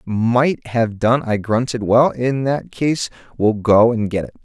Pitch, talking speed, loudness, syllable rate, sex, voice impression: 120 Hz, 190 wpm, -17 LUFS, 3.8 syllables/s, male, very masculine, very adult-like, sincere, calm, elegant, slightly sweet